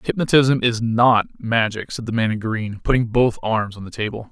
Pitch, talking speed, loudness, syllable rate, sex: 115 Hz, 210 wpm, -19 LUFS, 5.0 syllables/s, male